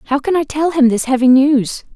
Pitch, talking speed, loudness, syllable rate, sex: 275 Hz, 245 wpm, -14 LUFS, 4.9 syllables/s, female